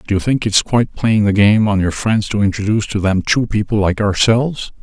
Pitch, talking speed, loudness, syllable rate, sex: 105 Hz, 235 wpm, -15 LUFS, 5.7 syllables/s, male